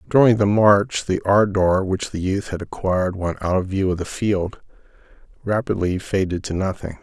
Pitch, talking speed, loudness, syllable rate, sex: 95 Hz, 180 wpm, -20 LUFS, 4.9 syllables/s, male